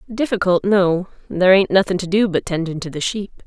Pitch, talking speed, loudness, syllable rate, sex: 185 Hz, 210 wpm, -18 LUFS, 5.5 syllables/s, female